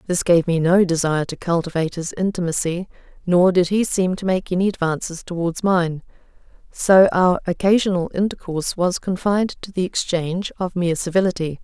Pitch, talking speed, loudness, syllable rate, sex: 180 Hz, 160 wpm, -20 LUFS, 5.6 syllables/s, female